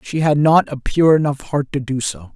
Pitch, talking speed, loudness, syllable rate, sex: 145 Hz, 255 wpm, -17 LUFS, 4.9 syllables/s, male